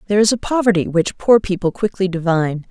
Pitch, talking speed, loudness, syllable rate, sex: 190 Hz, 200 wpm, -17 LUFS, 6.4 syllables/s, female